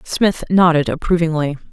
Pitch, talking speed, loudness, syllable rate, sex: 165 Hz, 140 wpm, -16 LUFS, 5.3 syllables/s, female